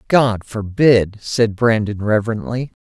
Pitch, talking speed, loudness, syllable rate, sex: 110 Hz, 105 wpm, -17 LUFS, 4.0 syllables/s, male